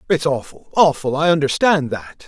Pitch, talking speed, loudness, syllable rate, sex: 150 Hz, 160 wpm, -17 LUFS, 4.9 syllables/s, male